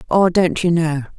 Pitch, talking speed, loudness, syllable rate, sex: 170 Hz, 200 wpm, -17 LUFS, 4.8 syllables/s, female